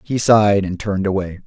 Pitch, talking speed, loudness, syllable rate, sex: 100 Hz, 205 wpm, -17 LUFS, 6.1 syllables/s, male